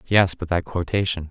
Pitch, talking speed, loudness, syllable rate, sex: 90 Hz, 185 wpm, -22 LUFS, 5.1 syllables/s, male